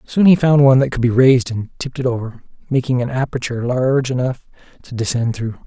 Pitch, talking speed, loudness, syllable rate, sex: 125 Hz, 210 wpm, -17 LUFS, 6.4 syllables/s, male